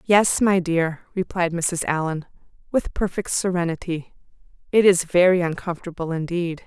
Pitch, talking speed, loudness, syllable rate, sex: 175 Hz, 125 wpm, -22 LUFS, 4.8 syllables/s, female